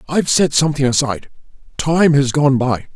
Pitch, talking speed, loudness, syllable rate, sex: 140 Hz, 160 wpm, -15 LUFS, 5.7 syllables/s, male